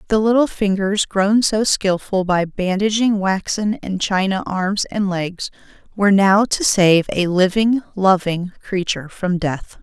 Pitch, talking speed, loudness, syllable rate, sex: 195 Hz, 145 wpm, -18 LUFS, 4.1 syllables/s, female